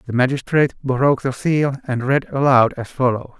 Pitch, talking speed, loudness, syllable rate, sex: 130 Hz, 175 wpm, -18 LUFS, 5.4 syllables/s, male